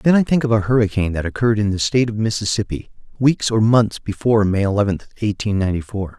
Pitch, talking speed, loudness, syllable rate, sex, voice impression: 105 Hz, 215 wpm, -18 LUFS, 6.6 syllables/s, male, masculine, adult-like, slightly refreshing, slightly calm, slightly friendly, kind